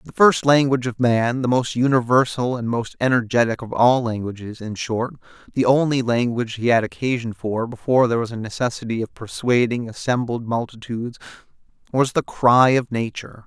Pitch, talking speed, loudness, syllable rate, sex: 120 Hz, 165 wpm, -20 LUFS, 5.5 syllables/s, male